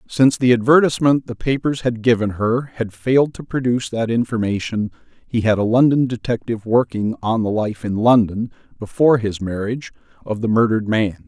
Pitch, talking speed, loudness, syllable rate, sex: 115 Hz, 170 wpm, -18 LUFS, 5.6 syllables/s, male